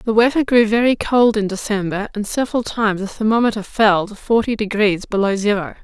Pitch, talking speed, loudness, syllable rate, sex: 215 Hz, 185 wpm, -17 LUFS, 5.8 syllables/s, female